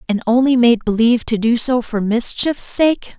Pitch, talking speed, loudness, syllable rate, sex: 235 Hz, 190 wpm, -15 LUFS, 4.8 syllables/s, female